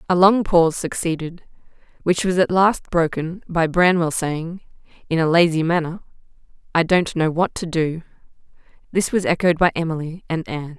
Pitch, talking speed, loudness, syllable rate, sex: 170 Hz, 160 wpm, -20 LUFS, 5.1 syllables/s, female